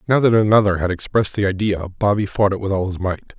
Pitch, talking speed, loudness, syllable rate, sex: 100 Hz, 250 wpm, -18 LUFS, 6.5 syllables/s, male